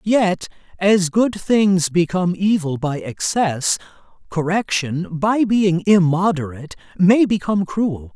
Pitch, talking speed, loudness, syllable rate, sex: 180 Hz, 110 wpm, -18 LUFS, 3.9 syllables/s, male